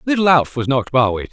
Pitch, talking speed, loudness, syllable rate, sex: 140 Hz, 225 wpm, -16 LUFS, 6.8 syllables/s, male